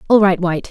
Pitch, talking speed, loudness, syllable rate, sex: 190 Hz, 255 wpm, -15 LUFS, 7.7 syllables/s, female